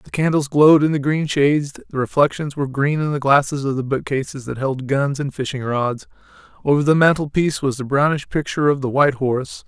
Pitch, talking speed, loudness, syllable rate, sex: 140 Hz, 215 wpm, -19 LUFS, 5.9 syllables/s, male